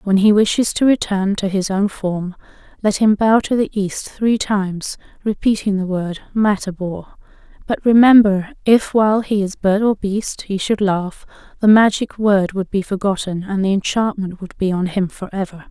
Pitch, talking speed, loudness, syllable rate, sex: 200 Hz, 180 wpm, -17 LUFS, 4.7 syllables/s, female